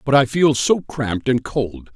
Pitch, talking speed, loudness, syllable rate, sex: 130 Hz, 215 wpm, -19 LUFS, 4.3 syllables/s, male